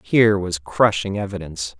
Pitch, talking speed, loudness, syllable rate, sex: 95 Hz, 135 wpm, -20 LUFS, 5.3 syllables/s, male